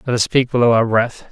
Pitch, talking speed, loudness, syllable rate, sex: 120 Hz, 275 wpm, -16 LUFS, 6.0 syllables/s, male